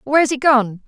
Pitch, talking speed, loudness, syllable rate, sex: 260 Hz, 205 wpm, -15 LUFS, 5.6 syllables/s, female